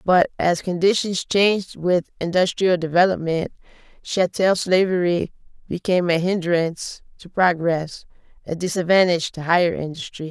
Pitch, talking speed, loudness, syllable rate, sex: 175 Hz, 110 wpm, -20 LUFS, 4.9 syllables/s, female